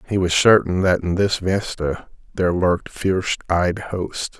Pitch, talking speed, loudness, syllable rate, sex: 90 Hz, 165 wpm, -20 LUFS, 4.5 syllables/s, male